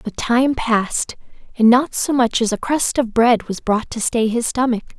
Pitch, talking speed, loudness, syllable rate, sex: 235 Hz, 215 wpm, -18 LUFS, 4.6 syllables/s, female